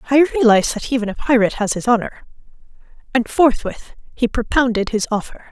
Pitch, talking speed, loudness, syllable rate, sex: 240 Hz, 165 wpm, -17 LUFS, 6.1 syllables/s, female